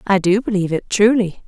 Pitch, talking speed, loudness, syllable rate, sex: 200 Hz, 205 wpm, -17 LUFS, 6.1 syllables/s, female